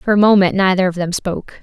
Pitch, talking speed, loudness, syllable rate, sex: 190 Hz, 260 wpm, -15 LUFS, 6.3 syllables/s, female